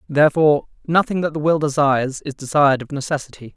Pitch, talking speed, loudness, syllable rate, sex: 145 Hz, 170 wpm, -18 LUFS, 6.6 syllables/s, male